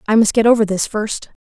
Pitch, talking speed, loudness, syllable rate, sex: 215 Hz, 250 wpm, -16 LUFS, 5.9 syllables/s, female